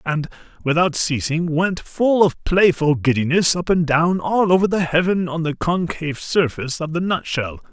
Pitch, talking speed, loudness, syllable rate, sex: 165 Hz, 170 wpm, -19 LUFS, 4.7 syllables/s, male